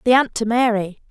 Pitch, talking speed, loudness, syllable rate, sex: 230 Hz, 215 wpm, -18 LUFS, 5.4 syllables/s, female